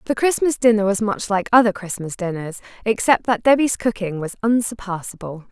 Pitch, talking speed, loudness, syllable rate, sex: 210 Hz, 165 wpm, -19 LUFS, 5.4 syllables/s, female